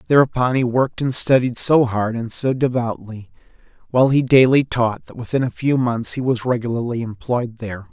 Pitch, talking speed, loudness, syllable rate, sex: 125 Hz, 180 wpm, -18 LUFS, 5.5 syllables/s, male